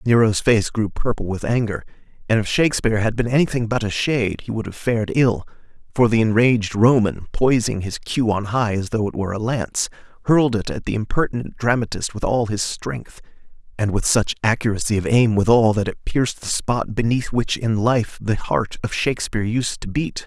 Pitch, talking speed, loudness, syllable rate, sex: 110 Hz, 200 wpm, -20 LUFS, 5.5 syllables/s, male